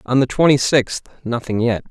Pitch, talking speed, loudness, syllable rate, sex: 125 Hz, 190 wpm, -18 LUFS, 5.2 syllables/s, male